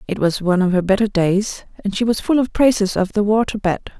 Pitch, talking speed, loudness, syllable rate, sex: 205 Hz, 255 wpm, -18 LUFS, 5.9 syllables/s, female